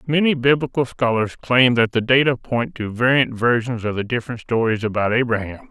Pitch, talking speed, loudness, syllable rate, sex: 120 Hz, 180 wpm, -19 LUFS, 5.4 syllables/s, male